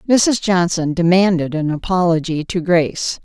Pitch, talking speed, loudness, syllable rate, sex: 175 Hz, 130 wpm, -16 LUFS, 4.7 syllables/s, female